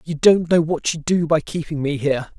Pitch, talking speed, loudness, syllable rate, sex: 160 Hz, 250 wpm, -19 LUFS, 5.4 syllables/s, male